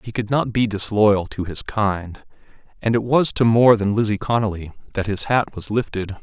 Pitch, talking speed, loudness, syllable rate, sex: 110 Hz, 200 wpm, -20 LUFS, 4.9 syllables/s, male